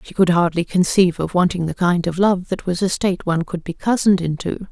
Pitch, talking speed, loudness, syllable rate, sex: 180 Hz, 240 wpm, -19 LUFS, 6.1 syllables/s, female